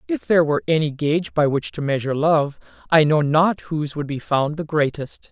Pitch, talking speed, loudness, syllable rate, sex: 155 Hz, 215 wpm, -20 LUFS, 5.7 syllables/s, female